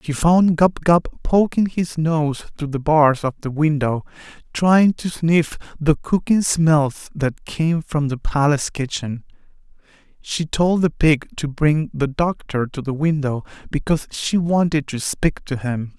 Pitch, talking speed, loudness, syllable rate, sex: 155 Hz, 160 wpm, -19 LUFS, 4.0 syllables/s, male